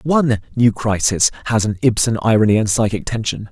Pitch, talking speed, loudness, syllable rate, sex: 110 Hz, 170 wpm, -17 LUFS, 5.6 syllables/s, male